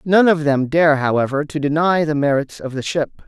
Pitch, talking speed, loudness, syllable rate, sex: 150 Hz, 220 wpm, -17 LUFS, 5.1 syllables/s, male